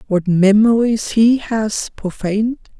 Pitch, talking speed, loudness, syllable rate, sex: 215 Hz, 105 wpm, -16 LUFS, 3.8 syllables/s, female